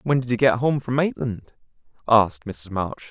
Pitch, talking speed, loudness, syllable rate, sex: 115 Hz, 195 wpm, -22 LUFS, 4.8 syllables/s, male